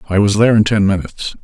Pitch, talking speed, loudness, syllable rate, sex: 100 Hz, 250 wpm, -13 LUFS, 7.7 syllables/s, male